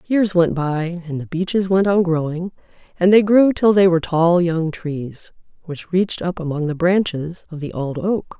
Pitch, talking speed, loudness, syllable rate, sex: 175 Hz, 200 wpm, -18 LUFS, 4.6 syllables/s, female